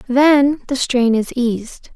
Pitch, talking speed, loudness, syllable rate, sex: 260 Hz, 155 wpm, -16 LUFS, 3.7 syllables/s, female